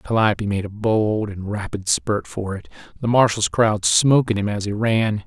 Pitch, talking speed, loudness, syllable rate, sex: 105 Hz, 195 wpm, -20 LUFS, 4.6 syllables/s, male